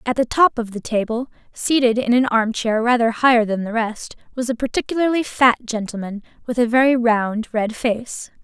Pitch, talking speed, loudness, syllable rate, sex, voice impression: 235 Hz, 190 wpm, -19 LUFS, 5.0 syllables/s, female, very feminine, young, very thin, very tensed, very powerful, slightly bright, slightly hard, very clear, very fluent, slightly raspy, very cute, slightly intellectual, very refreshing, sincere, slightly calm, very friendly, reassuring, very unique, slightly elegant, wild, sweet, very lively, strict, intense, slightly sharp, very light